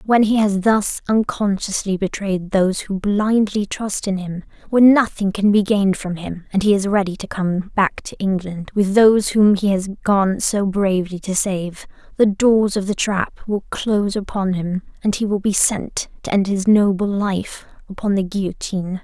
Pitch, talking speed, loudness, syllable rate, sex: 200 Hz, 190 wpm, -18 LUFS, 4.6 syllables/s, female